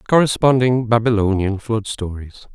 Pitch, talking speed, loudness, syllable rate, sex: 110 Hz, 120 wpm, -18 LUFS, 5.5 syllables/s, male